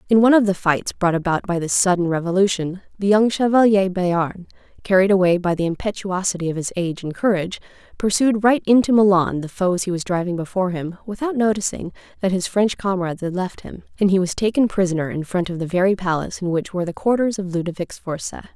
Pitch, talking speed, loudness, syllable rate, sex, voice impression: 190 Hz, 205 wpm, -20 LUFS, 6.1 syllables/s, female, very feminine, adult-like, thin, tensed, slightly powerful, bright, soft, clear, fluent, slightly raspy, cute, very intellectual, very refreshing, sincere, calm, very friendly, very reassuring, unique, elegant, slightly wild, sweet, slightly lively, kind